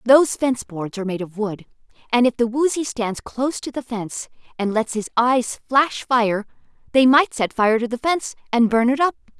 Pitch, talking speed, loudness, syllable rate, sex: 240 Hz, 210 wpm, -20 LUFS, 5.3 syllables/s, female